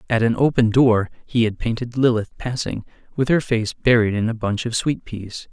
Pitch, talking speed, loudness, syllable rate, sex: 115 Hz, 205 wpm, -20 LUFS, 4.9 syllables/s, male